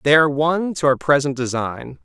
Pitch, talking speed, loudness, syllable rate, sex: 140 Hz, 205 wpm, -19 LUFS, 5.7 syllables/s, male